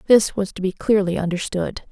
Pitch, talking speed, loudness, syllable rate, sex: 195 Hz, 190 wpm, -21 LUFS, 5.2 syllables/s, female